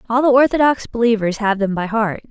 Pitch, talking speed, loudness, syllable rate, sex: 225 Hz, 210 wpm, -16 LUFS, 5.9 syllables/s, female